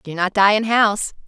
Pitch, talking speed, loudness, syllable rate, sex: 205 Hz, 235 wpm, -17 LUFS, 2.7 syllables/s, female